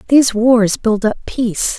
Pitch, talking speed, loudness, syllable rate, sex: 230 Hz, 170 wpm, -14 LUFS, 4.5 syllables/s, female